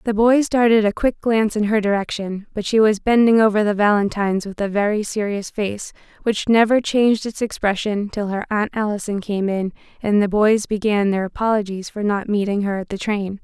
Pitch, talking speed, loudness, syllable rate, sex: 210 Hz, 200 wpm, -19 LUFS, 5.3 syllables/s, female